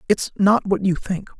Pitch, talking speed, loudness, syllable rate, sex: 190 Hz, 215 wpm, -20 LUFS, 4.6 syllables/s, male